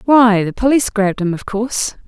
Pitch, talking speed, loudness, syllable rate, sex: 220 Hz, 205 wpm, -15 LUFS, 5.4 syllables/s, female